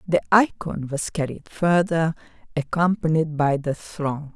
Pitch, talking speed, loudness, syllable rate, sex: 160 Hz, 125 wpm, -23 LUFS, 4.1 syllables/s, female